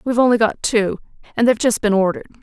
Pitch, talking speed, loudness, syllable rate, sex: 225 Hz, 225 wpm, -17 LUFS, 7.7 syllables/s, female